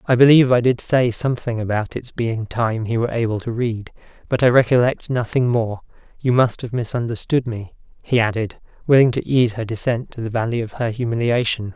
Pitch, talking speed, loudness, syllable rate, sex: 120 Hz, 190 wpm, -19 LUFS, 5.6 syllables/s, male